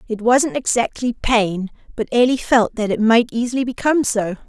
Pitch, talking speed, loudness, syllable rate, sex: 235 Hz, 175 wpm, -18 LUFS, 5.1 syllables/s, female